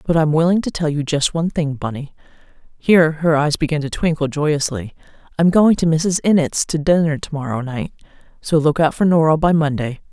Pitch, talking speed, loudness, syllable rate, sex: 155 Hz, 185 wpm, -17 LUFS, 5.6 syllables/s, female